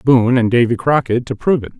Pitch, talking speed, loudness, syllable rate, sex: 125 Hz, 235 wpm, -15 LUFS, 6.7 syllables/s, male